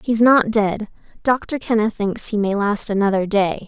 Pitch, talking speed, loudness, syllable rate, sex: 210 Hz, 180 wpm, -18 LUFS, 4.7 syllables/s, female